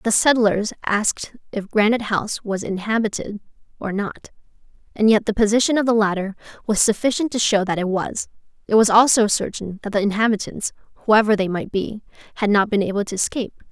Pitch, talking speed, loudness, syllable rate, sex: 210 Hz, 180 wpm, -20 LUFS, 5.8 syllables/s, female